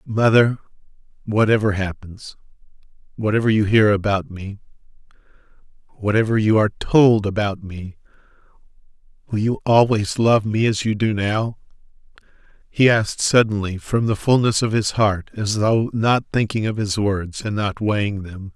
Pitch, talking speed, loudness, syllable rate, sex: 105 Hz, 140 wpm, -19 LUFS, 4.7 syllables/s, male